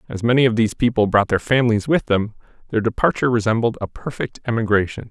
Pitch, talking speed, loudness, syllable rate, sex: 115 Hz, 190 wpm, -19 LUFS, 6.7 syllables/s, male